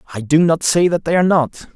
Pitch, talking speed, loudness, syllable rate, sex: 160 Hz, 275 wpm, -15 LUFS, 6.3 syllables/s, male